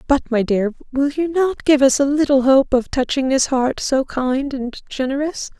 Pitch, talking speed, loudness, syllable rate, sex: 270 Hz, 205 wpm, -18 LUFS, 4.5 syllables/s, female